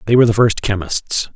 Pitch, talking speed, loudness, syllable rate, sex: 110 Hz, 220 wpm, -16 LUFS, 5.9 syllables/s, male